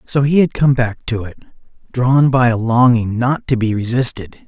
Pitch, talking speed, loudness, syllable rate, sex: 120 Hz, 200 wpm, -15 LUFS, 4.7 syllables/s, male